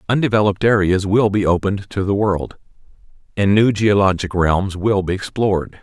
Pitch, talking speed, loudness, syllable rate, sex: 100 Hz, 155 wpm, -17 LUFS, 5.4 syllables/s, male